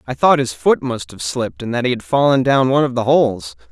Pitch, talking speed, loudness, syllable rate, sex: 125 Hz, 275 wpm, -16 LUFS, 6.1 syllables/s, male